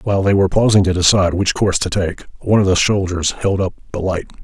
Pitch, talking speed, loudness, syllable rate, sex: 95 Hz, 245 wpm, -16 LUFS, 6.9 syllables/s, male